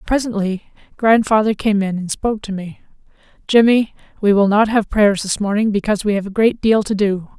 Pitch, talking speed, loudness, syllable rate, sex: 210 Hz, 195 wpm, -17 LUFS, 5.5 syllables/s, female